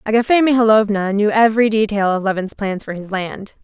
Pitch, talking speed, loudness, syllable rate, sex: 210 Hz, 180 wpm, -16 LUFS, 5.8 syllables/s, female